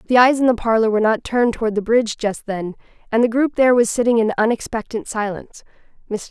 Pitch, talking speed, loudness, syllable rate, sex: 225 Hz, 210 wpm, -18 LUFS, 6.6 syllables/s, female